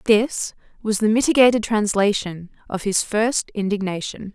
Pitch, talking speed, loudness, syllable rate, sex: 210 Hz, 125 wpm, -20 LUFS, 4.6 syllables/s, female